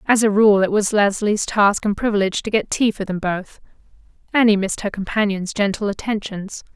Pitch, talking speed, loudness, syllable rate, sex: 205 Hz, 185 wpm, -19 LUFS, 5.5 syllables/s, female